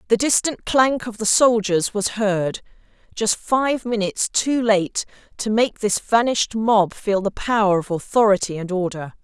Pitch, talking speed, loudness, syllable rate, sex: 215 Hz, 160 wpm, -20 LUFS, 4.4 syllables/s, female